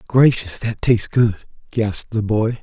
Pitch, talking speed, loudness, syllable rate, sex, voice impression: 110 Hz, 160 wpm, -19 LUFS, 4.7 syllables/s, male, very masculine, old, relaxed, slightly weak, slightly bright, slightly soft, clear, fluent, cool, very intellectual, refreshing, sincere, very calm, very mature, very friendly, very reassuring, very unique, very elegant, slightly wild, sweet, lively, kind, slightly intense, slightly sharp